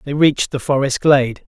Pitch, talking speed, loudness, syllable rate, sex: 140 Hz, 195 wpm, -16 LUFS, 5.9 syllables/s, male